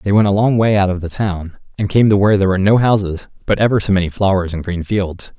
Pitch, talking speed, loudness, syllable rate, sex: 100 Hz, 280 wpm, -15 LUFS, 6.5 syllables/s, male